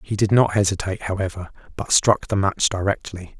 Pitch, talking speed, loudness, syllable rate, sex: 100 Hz, 175 wpm, -20 LUFS, 5.6 syllables/s, male